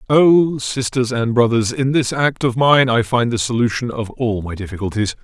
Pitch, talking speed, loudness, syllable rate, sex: 120 Hz, 195 wpm, -17 LUFS, 4.9 syllables/s, male